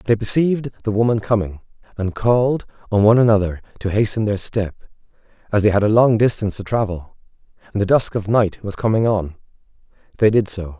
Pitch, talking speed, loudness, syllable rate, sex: 105 Hz, 185 wpm, -18 LUFS, 5.9 syllables/s, male